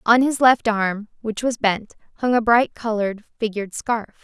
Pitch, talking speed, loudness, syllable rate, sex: 225 Hz, 185 wpm, -20 LUFS, 4.9 syllables/s, female